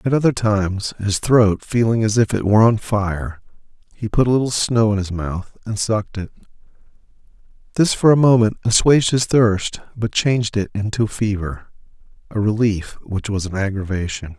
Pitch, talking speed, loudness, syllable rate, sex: 105 Hz, 165 wpm, -18 LUFS, 5.0 syllables/s, male